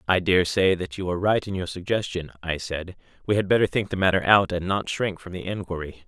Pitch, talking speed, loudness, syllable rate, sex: 90 Hz, 245 wpm, -24 LUFS, 5.8 syllables/s, male